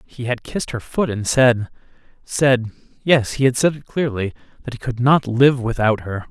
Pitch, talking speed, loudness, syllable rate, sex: 125 Hz, 200 wpm, -19 LUFS, 4.1 syllables/s, male